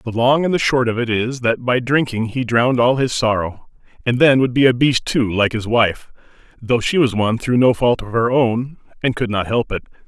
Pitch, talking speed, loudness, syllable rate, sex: 120 Hz, 245 wpm, -17 LUFS, 5.2 syllables/s, male